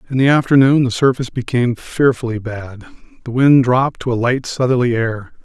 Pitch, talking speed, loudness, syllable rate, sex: 125 Hz, 165 wpm, -15 LUFS, 5.5 syllables/s, male